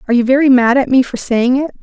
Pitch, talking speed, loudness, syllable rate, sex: 255 Hz, 295 wpm, -12 LUFS, 7.0 syllables/s, female